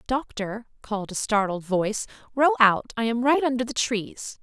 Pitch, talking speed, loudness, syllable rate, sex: 230 Hz, 175 wpm, -24 LUFS, 4.9 syllables/s, female